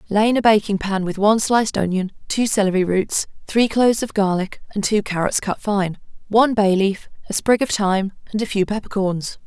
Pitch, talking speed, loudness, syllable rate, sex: 205 Hz, 205 wpm, -19 LUFS, 5.6 syllables/s, female